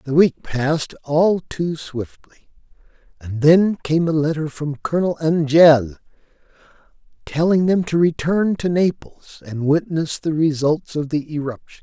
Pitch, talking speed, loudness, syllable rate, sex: 155 Hz, 135 wpm, -19 LUFS, 4.4 syllables/s, male